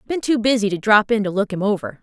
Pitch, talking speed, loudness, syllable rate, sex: 210 Hz, 295 wpm, -18 LUFS, 6.4 syllables/s, female